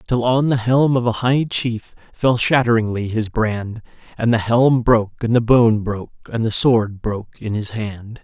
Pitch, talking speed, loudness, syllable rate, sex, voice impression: 115 Hz, 195 wpm, -18 LUFS, 4.5 syllables/s, male, very masculine, old, very thick, tensed, slightly powerful, slightly dark, soft, slightly muffled, fluent, slightly raspy, cool, intellectual, very sincere, very calm, very mature, very friendly, very reassuring, unique, elegant, wild, sweet, slightly lively, strict, slightly intense, slightly modest